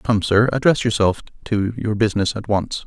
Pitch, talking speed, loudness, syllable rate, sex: 110 Hz, 190 wpm, -19 LUFS, 5.1 syllables/s, male